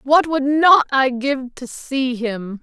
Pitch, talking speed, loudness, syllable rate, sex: 265 Hz, 185 wpm, -17 LUFS, 3.3 syllables/s, female